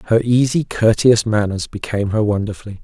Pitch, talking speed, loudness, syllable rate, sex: 110 Hz, 150 wpm, -17 LUFS, 5.8 syllables/s, male